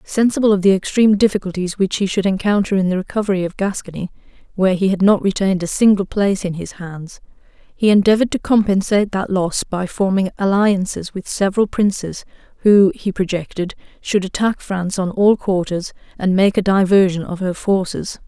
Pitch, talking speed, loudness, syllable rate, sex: 195 Hz, 175 wpm, -17 LUFS, 5.7 syllables/s, female